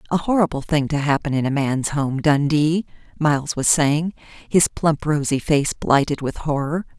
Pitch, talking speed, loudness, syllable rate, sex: 150 Hz, 170 wpm, -20 LUFS, 4.6 syllables/s, female